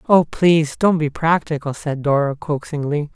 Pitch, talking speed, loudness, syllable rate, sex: 150 Hz, 150 wpm, -19 LUFS, 5.0 syllables/s, male